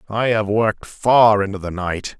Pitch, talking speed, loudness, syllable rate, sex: 105 Hz, 190 wpm, -18 LUFS, 4.5 syllables/s, male